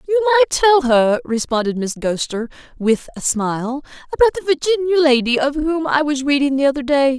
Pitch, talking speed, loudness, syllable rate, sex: 285 Hz, 185 wpm, -17 LUFS, 6.0 syllables/s, female